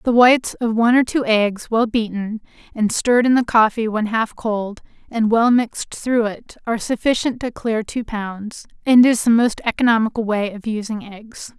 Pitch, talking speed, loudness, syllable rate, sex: 225 Hz, 190 wpm, -18 LUFS, 4.9 syllables/s, female